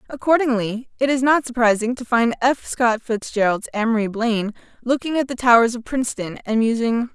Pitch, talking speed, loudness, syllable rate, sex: 240 Hz, 170 wpm, -20 LUFS, 5.4 syllables/s, female